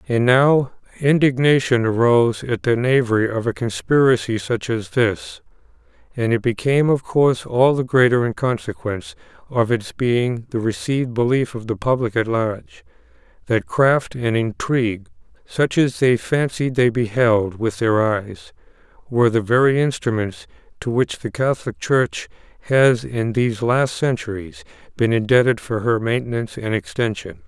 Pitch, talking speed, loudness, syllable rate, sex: 120 Hz, 145 wpm, -19 LUFS, 4.7 syllables/s, male